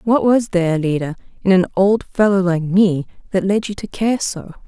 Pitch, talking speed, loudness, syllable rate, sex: 190 Hz, 205 wpm, -17 LUFS, 5.2 syllables/s, female